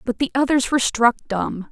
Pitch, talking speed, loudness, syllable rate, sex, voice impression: 250 Hz, 210 wpm, -19 LUFS, 5.4 syllables/s, female, feminine, slightly young, slightly adult-like, slightly relaxed, bright, slightly soft, muffled, slightly cute, friendly, slightly kind